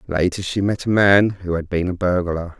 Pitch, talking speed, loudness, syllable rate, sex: 90 Hz, 230 wpm, -19 LUFS, 5.0 syllables/s, male